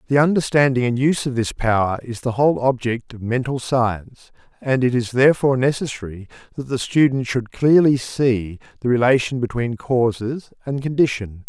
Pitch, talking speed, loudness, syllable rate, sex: 125 Hz, 160 wpm, -19 LUFS, 5.3 syllables/s, male